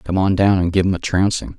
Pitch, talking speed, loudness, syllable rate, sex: 95 Hz, 305 wpm, -17 LUFS, 6.0 syllables/s, male